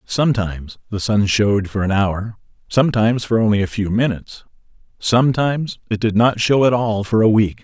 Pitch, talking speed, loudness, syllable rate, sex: 110 Hz, 180 wpm, -17 LUFS, 5.6 syllables/s, male